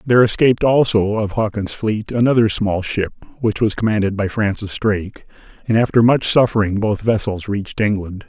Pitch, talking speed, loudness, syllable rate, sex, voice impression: 105 Hz, 165 wpm, -17 LUFS, 5.4 syllables/s, male, very masculine, slightly old, thick, muffled, calm, friendly, reassuring, elegant, slightly kind